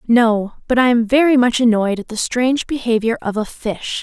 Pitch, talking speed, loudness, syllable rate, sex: 235 Hz, 210 wpm, -16 LUFS, 5.1 syllables/s, female